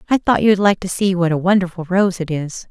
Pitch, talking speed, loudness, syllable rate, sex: 185 Hz, 290 wpm, -17 LUFS, 6.0 syllables/s, female